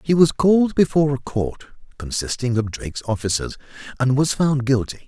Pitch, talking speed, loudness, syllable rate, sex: 135 Hz, 165 wpm, -20 LUFS, 5.5 syllables/s, male